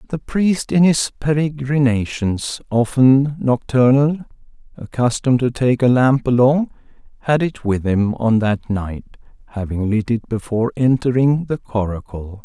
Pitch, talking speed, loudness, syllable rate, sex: 125 Hz, 130 wpm, -17 LUFS, 4.3 syllables/s, male